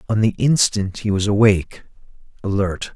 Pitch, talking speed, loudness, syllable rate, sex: 105 Hz, 140 wpm, -18 LUFS, 5.1 syllables/s, male